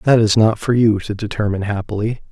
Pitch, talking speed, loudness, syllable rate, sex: 110 Hz, 205 wpm, -17 LUFS, 6.1 syllables/s, male